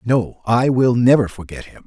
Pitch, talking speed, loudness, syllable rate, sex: 115 Hz, 195 wpm, -16 LUFS, 4.6 syllables/s, male